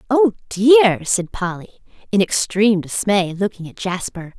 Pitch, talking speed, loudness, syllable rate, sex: 200 Hz, 135 wpm, -18 LUFS, 4.5 syllables/s, female